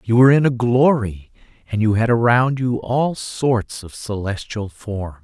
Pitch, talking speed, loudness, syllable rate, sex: 115 Hz, 170 wpm, -18 LUFS, 4.3 syllables/s, male